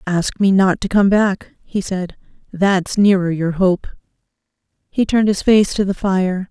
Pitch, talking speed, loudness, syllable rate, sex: 190 Hz, 175 wpm, -16 LUFS, 4.2 syllables/s, female